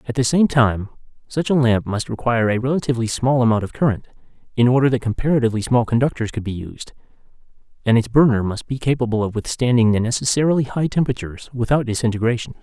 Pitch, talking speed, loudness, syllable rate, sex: 120 Hz, 180 wpm, -19 LUFS, 6.8 syllables/s, male